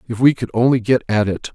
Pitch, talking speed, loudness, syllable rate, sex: 115 Hz, 270 wpm, -17 LUFS, 6.1 syllables/s, male